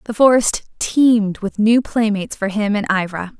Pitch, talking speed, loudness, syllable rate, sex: 215 Hz, 175 wpm, -17 LUFS, 5.0 syllables/s, female